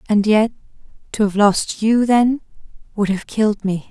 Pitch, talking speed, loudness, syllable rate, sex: 210 Hz, 170 wpm, -17 LUFS, 4.6 syllables/s, female